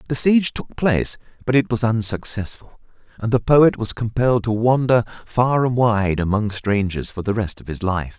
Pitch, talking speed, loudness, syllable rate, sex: 115 Hz, 190 wpm, -19 LUFS, 5.1 syllables/s, male